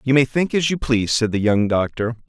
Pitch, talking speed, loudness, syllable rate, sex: 125 Hz, 265 wpm, -19 LUFS, 5.7 syllables/s, male